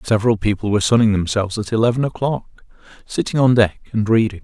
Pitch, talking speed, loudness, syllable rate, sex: 110 Hz, 175 wpm, -18 LUFS, 6.4 syllables/s, male